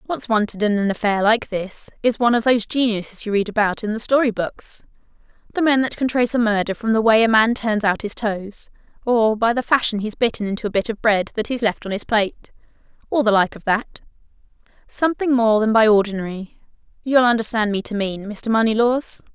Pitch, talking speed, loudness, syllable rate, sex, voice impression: 220 Hz, 205 wpm, -19 LUFS, 5.7 syllables/s, female, feminine, slightly young, slightly cute, friendly